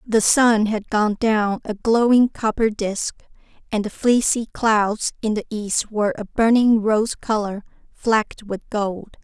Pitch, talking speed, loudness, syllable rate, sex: 215 Hz, 155 wpm, -20 LUFS, 3.9 syllables/s, female